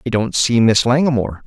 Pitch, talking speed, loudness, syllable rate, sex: 120 Hz, 205 wpm, -15 LUFS, 5.4 syllables/s, male